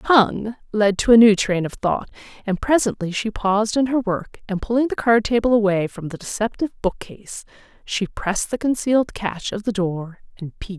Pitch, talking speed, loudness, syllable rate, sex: 210 Hz, 205 wpm, -20 LUFS, 5.3 syllables/s, female